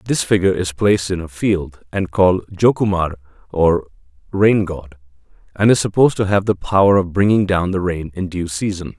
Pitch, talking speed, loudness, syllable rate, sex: 90 Hz, 185 wpm, -17 LUFS, 5.4 syllables/s, male